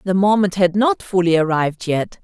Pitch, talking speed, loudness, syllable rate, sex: 185 Hz, 190 wpm, -17 LUFS, 5.3 syllables/s, female